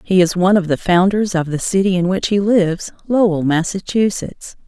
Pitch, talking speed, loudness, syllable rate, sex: 185 Hz, 190 wpm, -16 LUFS, 5.3 syllables/s, female